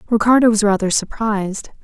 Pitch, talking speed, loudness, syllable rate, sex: 215 Hz, 130 wpm, -16 LUFS, 5.8 syllables/s, female